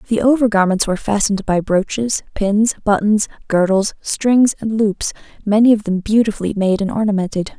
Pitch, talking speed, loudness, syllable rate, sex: 210 Hz, 160 wpm, -16 LUFS, 5.4 syllables/s, female